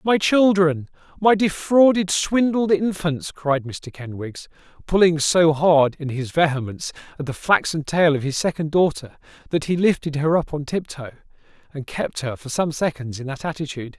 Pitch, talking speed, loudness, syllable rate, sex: 160 Hz, 165 wpm, -20 LUFS, 4.9 syllables/s, male